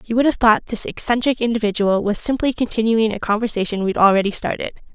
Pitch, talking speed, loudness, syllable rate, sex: 220 Hz, 180 wpm, -19 LUFS, 6.4 syllables/s, female